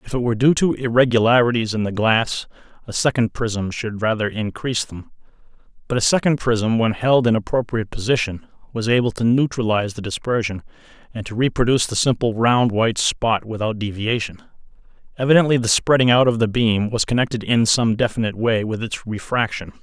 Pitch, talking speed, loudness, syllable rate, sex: 115 Hz, 175 wpm, -19 LUFS, 5.7 syllables/s, male